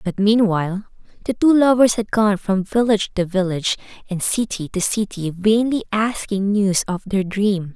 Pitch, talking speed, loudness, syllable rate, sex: 200 Hz, 165 wpm, -19 LUFS, 4.8 syllables/s, female